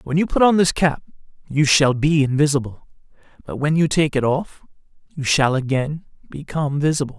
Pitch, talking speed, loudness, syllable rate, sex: 145 Hz, 175 wpm, -19 LUFS, 5.5 syllables/s, male